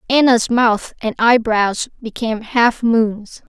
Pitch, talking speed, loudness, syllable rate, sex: 230 Hz, 120 wpm, -16 LUFS, 3.6 syllables/s, female